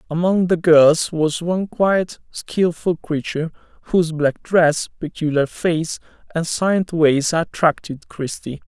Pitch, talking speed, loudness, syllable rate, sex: 165 Hz, 125 wpm, -19 LUFS, 4.0 syllables/s, male